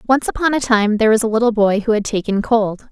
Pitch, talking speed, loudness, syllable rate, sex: 220 Hz, 270 wpm, -16 LUFS, 6.3 syllables/s, female